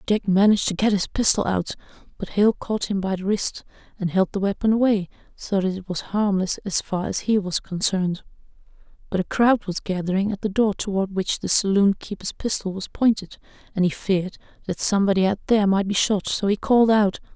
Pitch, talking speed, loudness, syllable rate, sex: 195 Hz, 205 wpm, -22 LUFS, 5.6 syllables/s, female